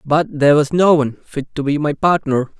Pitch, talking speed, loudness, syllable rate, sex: 150 Hz, 230 wpm, -16 LUFS, 5.6 syllables/s, male